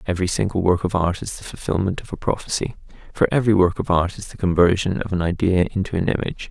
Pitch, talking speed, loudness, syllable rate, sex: 90 Hz, 230 wpm, -21 LUFS, 6.6 syllables/s, male